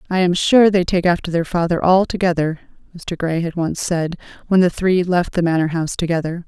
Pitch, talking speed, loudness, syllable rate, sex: 175 Hz, 205 wpm, -18 LUFS, 5.5 syllables/s, female